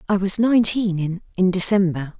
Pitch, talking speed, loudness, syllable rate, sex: 190 Hz, 135 wpm, -19 LUFS, 5.4 syllables/s, female